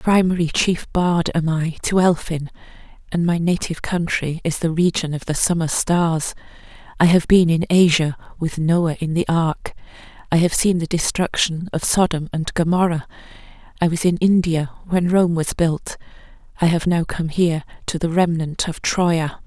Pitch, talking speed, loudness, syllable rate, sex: 170 Hz, 170 wpm, -19 LUFS, 4.7 syllables/s, female